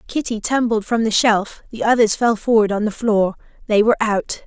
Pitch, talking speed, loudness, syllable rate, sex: 220 Hz, 190 wpm, -18 LUFS, 5.2 syllables/s, female